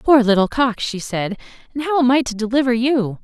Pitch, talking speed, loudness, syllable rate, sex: 240 Hz, 225 wpm, -18 LUFS, 5.4 syllables/s, female